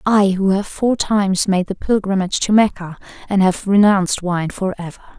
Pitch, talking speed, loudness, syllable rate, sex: 195 Hz, 185 wpm, -17 LUFS, 5.3 syllables/s, female